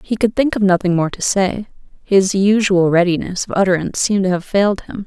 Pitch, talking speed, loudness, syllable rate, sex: 195 Hz, 215 wpm, -16 LUFS, 5.8 syllables/s, female